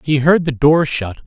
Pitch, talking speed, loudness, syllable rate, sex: 145 Hz, 240 wpm, -15 LUFS, 4.6 syllables/s, male